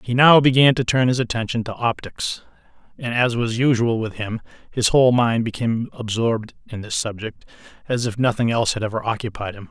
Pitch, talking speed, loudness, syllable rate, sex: 115 Hz, 190 wpm, -20 LUFS, 5.7 syllables/s, male